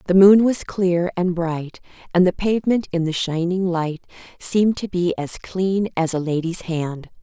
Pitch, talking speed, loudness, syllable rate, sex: 180 Hz, 185 wpm, -20 LUFS, 4.6 syllables/s, female